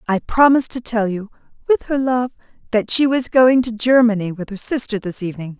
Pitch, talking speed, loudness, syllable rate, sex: 235 Hz, 205 wpm, -17 LUFS, 5.6 syllables/s, female